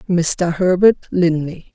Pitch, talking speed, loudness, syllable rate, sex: 175 Hz, 105 wpm, -16 LUFS, 3.5 syllables/s, female